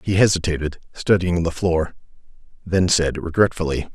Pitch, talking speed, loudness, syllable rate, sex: 85 Hz, 120 wpm, -20 LUFS, 5.0 syllables/s, male